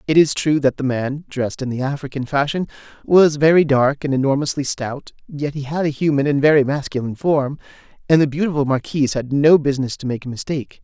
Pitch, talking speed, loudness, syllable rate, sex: 140 Hz, 205 wpm, -18 LUFS, 6.0 syllables/s, male